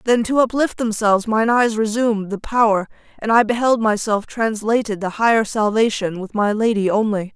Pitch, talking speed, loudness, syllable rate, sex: 220 Hz, 170 wpm, -18 LUFS, 5.2 syllables/s, female